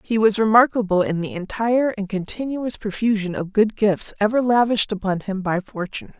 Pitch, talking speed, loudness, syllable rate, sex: 210 Hz, 175 wpm, -21 LUFS, 5.5 syllables/s, female